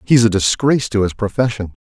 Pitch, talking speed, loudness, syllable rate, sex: 110 Hz, 195 wpm, -16 LUFS, 6.0 syllables/s, male